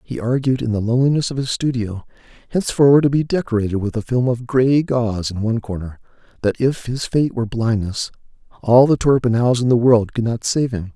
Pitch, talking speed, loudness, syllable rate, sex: 120 Hz, 205 wpm, -18 LUFS, 5.8 syllables/s, male